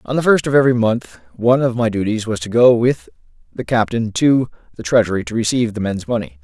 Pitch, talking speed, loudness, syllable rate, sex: 115 Hz, 225 wpm, -17 LUFS, 6.3 syllables/s, male